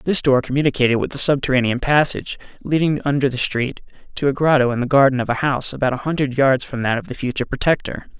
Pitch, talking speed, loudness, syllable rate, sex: 135 Hz, 220 wpm, -18 LUFS, 6.7 syllables/s, male